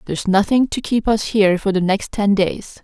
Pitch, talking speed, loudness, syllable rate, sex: 205 Hz, 235 wpm, -17 LUFS, 5.2 syllables/s, female